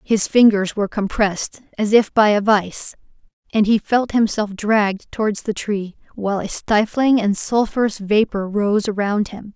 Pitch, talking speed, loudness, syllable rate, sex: 210 Hz, 165 wpm, -18 LUFS, 4.6 syllables/s, female